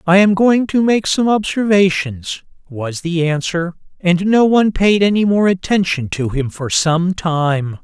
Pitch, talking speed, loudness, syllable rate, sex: 180 Hz, 170 wpm, -15 LUFS, 4.2 syllables/s, male